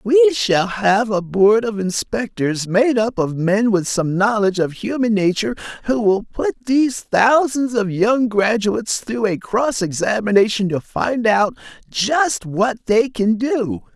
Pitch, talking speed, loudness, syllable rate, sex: 215 Hz, 160 wpm, -18 LUFS, 4.0 syllables/s, male